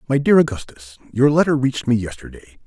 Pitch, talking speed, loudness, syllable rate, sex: 130 Hz, 160 wpm, -17 LUFS, 6.7 syllables/s, male